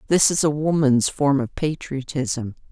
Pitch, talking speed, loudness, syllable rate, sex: 140 Hz, 155 wpm, -21 LUFS, 4.2 syllables/s, female